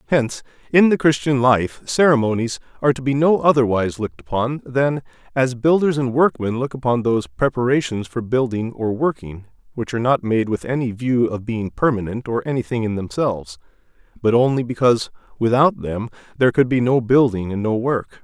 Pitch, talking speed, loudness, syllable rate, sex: 125 Hz, 175 wpm, -19 LUFS, 5.5 syllables/s, male